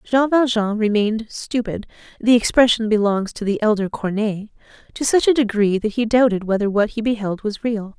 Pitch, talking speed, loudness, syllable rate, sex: 220 Hz, 165 wpm, -19 LUFS, 5.5 syllables/s, female